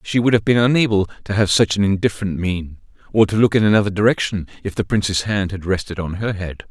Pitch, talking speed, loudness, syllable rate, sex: 100 Hz, 235 wpm, -18 LUFS, 6.4 syllables/s, male